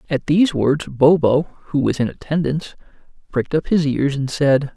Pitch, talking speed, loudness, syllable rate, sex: 145 Hz, 175 wpm, -18 LUFS, 5.1 syllables/s, male